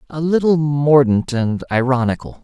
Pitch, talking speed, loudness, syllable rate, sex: 140 Hz, 125 wpm, -16 LUFS, 4.6 syllables/s, male